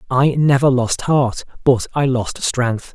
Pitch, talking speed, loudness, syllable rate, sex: 130 Hz, 165 wpm, -17 LUFS, 3.7 syllables/s, male